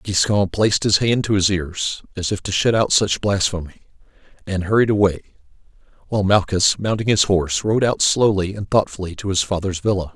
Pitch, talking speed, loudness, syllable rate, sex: 100 Hz, 185 wpm, -19 LUFS, 5.6 syllables/s, male